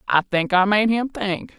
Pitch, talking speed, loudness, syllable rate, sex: 205 Hz, 225 wpm, -20 LUFS, 4.3 syllables/s, female